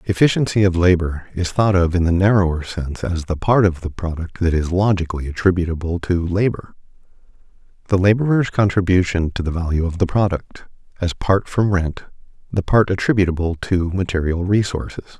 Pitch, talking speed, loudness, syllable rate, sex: 90 Hz, 155 wpm, -19 LUFS, 5.6 syllables/s, male